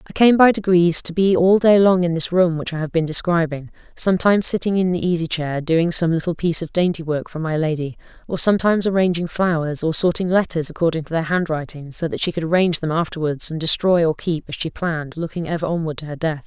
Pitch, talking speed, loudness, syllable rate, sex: 170 Hz, 235 wpm, -19 LUFS, 6.2 syllables/s, female